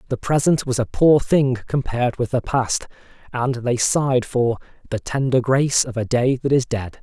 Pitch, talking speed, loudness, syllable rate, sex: 125 Hz, 195 wpm, -20 LUFS, 4.9 syllables/s, male